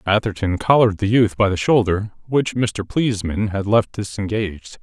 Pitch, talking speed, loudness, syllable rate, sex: 105 Hz, 160 wpm, -19 LUFS, 4.9 syllables/s, male